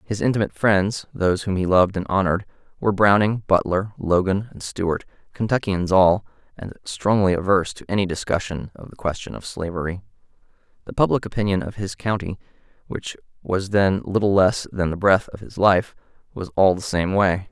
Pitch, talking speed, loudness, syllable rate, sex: 95 Hz, 170 wpm, -21 LUFS, 5.5 syllables/s, male